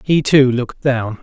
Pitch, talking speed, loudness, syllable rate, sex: 130 Hz, 195 wpm, -15 LUFS, 4.4 syllables/s, male